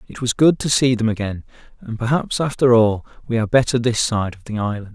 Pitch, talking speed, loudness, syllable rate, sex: 115 Hz, 230 wpm, -19 LUFS, 6.0 syllables/s, male